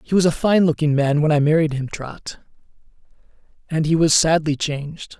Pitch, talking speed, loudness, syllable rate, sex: 155 Hz, 175 wpm, -18 LUFS, 5.2 syllables/s, male